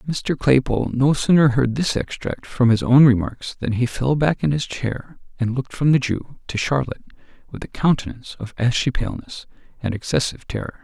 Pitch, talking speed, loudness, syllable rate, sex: 130 Hz, 190 wpm, -20 LUFS, 5.4 syllables/s, male